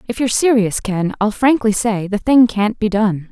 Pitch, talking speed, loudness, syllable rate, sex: 215 Hz, 215 wpm, -16 LUFS, 4.9 syllables/s, female